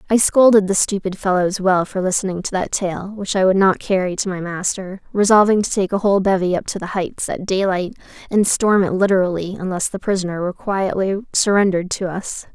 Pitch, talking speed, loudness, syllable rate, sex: 190 Hz, 210 wpm, -18 LUFS, 5.7 syllables/s, female